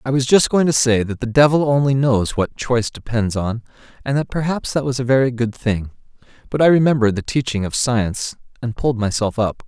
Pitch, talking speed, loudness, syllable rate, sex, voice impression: 125 Hz, 215 wpm, -18 LUFS, 5.8 syllables/s, male, masculine, adult-like, tensed, powerful, bright, clear, cool, intellectual, calm, friendly, reassuring, slightly wild, lively, kind